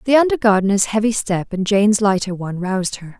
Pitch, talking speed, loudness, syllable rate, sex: 205 Hz, 205 wpm, -17 LUFS, 6.2 syllables/s, female